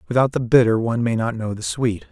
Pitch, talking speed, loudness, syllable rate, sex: 115 Hz, 255 wpm, -20 LUFS, 6.3 syllables/s, male